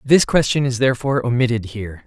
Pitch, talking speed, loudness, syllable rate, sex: 125 Hz, 175 wpm, -18 LUFS, 7.0 syllables/s, male